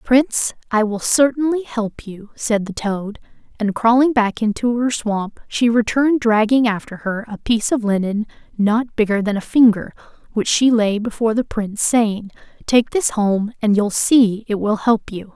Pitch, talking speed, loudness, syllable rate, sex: 225 Hz, 180 wpm, -18 LUFS, 4.6 syllables/s, female